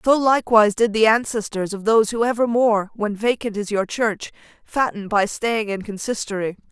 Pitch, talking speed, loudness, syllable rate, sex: 215 Hz, 170 wpm, -20 LUFS, 5.4 syllables/s, female